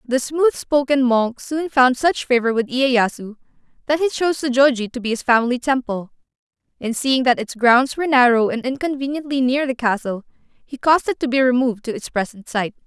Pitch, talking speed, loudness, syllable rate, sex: 255 Hz, 190 wpm, -18 LUFS, 5.4 syllables/s, female